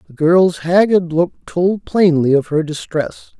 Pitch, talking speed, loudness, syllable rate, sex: 165 Hz, 160 wpm, -15 LUFS, 3.9 syllables/s, male